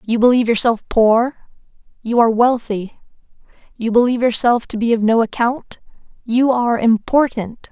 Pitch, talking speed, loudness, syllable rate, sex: 235 Hz, 140 wpm, -16 LUFS, 5.1 syllables/s, female